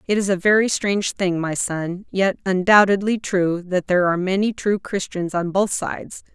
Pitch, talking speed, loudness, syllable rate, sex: 190 Hz, 190 wpm, -20 LUFS, 5.0 syllables/s, female